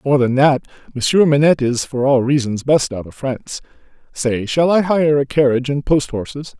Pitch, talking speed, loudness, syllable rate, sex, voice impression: 140 Hz, 200 wpm, -16 LUFS, 5.3 syllables/s, male, masculine, middle-aged, thick, slightly tensed, powerful, slightly soft, slightly muffled, cool, intellectual, calm, mature, reassuring, wild, lively, kind